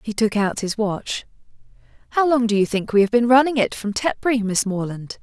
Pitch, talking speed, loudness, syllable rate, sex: 220 Hz, 220 wpm, -20 LUFS, 5.4 syllables/s, female